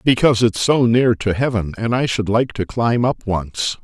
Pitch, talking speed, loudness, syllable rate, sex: 115 Hz, 220 wpm, -18 LUFS, 4.7 syllables/s, male